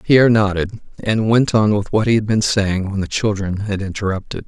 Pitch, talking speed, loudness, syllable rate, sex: 105 Hz, 215 wpm, -17 LUFS, 5.3 syllables/s, male